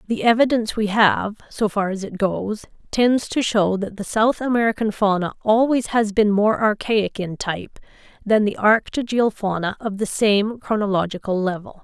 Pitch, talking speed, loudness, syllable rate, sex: 210 Hz, 165 wpm, -20 LUFS, 4.8 syllables/s, female